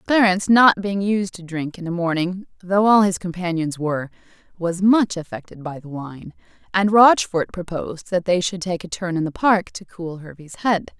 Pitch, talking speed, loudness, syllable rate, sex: 180 Hz, 195 wpm, -20 LUFS, 4.9 syllables/s, female